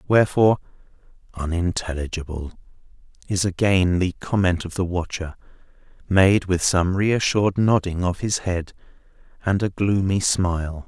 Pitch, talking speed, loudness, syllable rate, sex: 90 Hz, 115 wpm, -21 LUFS, 4.7 syllables/s, male